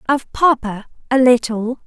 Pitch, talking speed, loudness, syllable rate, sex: 245 Hz, 95 wpm, -16 LUFS, 4.3 syllables/s, female